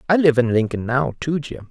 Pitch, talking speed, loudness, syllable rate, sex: 135 Hz, 245 wpm, -19 LUFS, 5.5 syllables/s, male